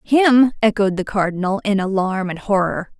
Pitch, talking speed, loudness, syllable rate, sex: 205 Hz, 160 wpm, -18 LUFS, 4.8 syllables/s, female